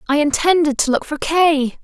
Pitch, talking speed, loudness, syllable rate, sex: 300 Hz, 195 wpm, -16 LUFS, 5.0 syllables/s, female